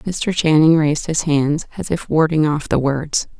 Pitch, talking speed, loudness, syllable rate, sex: 155 Hz, 195 wpm, -17 LUFS, 4.4 syllables/s, female